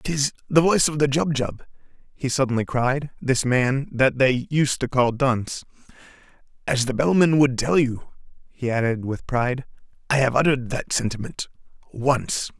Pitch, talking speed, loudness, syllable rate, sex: 130 Hz, 155 wpm, -22 LUFS, 4.1 syllables/s, male